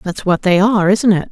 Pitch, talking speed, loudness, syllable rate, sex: 195 Hz, 275 wpm, -14 LUFS, 5.8 syllables/s, female